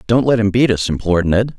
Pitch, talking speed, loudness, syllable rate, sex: 105 Hz, 265 wpm, -15 LUFS, 6.3 syllables/s, male